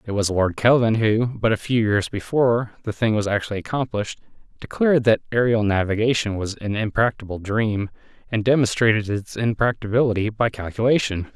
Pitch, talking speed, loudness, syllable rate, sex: 110 Hz, 155 wpm, -21 LUFS, 5.8 syllables/s, male